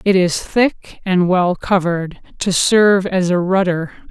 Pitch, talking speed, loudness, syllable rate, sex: 185 Hz, 160 wpm, -16 LUFS, 4.1 syllables/s, female